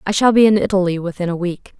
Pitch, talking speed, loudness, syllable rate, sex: 190 Hz, 270 wpm, -16 LUFS, 6.6 syllables/s, female